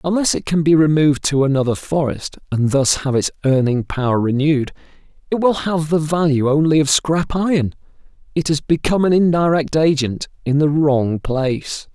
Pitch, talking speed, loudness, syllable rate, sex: 150 Hz, 170 wpm, -17 LUFS, 5.2 syllables/s, male